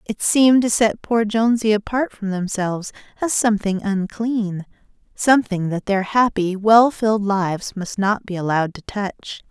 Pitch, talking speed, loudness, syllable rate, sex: 210 Hz, 150 wpm, -19 LUFS, 4.9 syllables/s, female